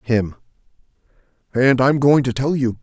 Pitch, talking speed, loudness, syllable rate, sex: 130 Hz, 150 wpm, -17 LUFS, 4.5 syllables/s, male